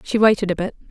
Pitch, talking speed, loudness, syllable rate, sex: 200 Hz, 265 wpm, -19 LUFS, 7.3 syllables/s, female